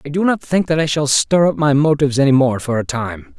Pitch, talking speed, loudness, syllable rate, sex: 140 Hz, 285 wpm, -16 LUFS, 5.8 syllables/s, male